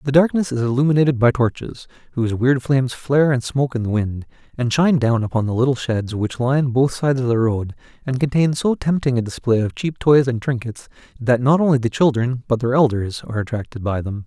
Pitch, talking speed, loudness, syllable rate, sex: 125 Hz, 220 wpm, -19 LUFS, 5.9 syllables/s, male